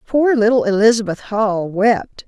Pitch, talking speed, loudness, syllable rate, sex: 215 Hz, 130 wpm, -16 LUFS, 4.2 syllables/s, female